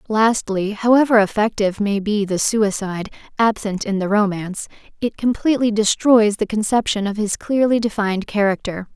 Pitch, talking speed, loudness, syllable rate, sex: 210 Hz, 140 wpm, -18 LUFS, 5.3 syllables/s, female